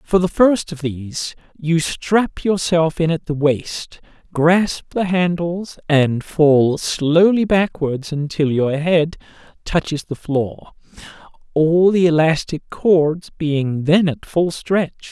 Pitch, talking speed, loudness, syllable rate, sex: 165 Hz, 130 wpm, -18 LUFS, 3.3 syllables/s, male